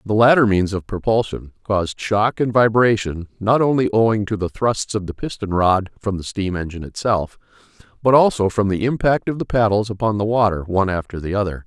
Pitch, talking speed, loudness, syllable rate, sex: 105 Hz, 200 wpm, -19 LUFS, 5.6 syllables/s, male